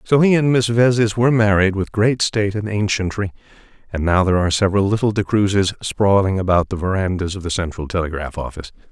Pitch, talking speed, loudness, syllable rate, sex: 100 Hz, 190 wpm, -18 LUFS, 6.2 syllables/s, male